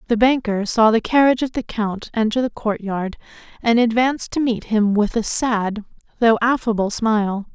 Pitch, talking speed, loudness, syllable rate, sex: 225 Hz, 185 wpm, -19 LUFS, 4.9 syllables/s, female